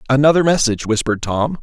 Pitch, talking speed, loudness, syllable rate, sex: 130 Hz, 150 wpm, -16 LUFS, 7.0 syllables/s, male